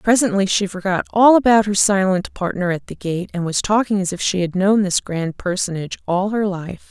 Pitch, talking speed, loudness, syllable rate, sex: 195 Hz, 215 wpm, -18 LUFS, 5.3 syllables/s, female